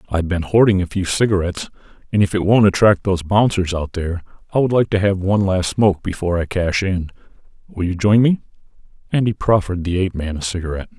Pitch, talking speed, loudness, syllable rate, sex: 95 Hz, 220 wpm, -18 LUFS, 6.7 syllables/s, male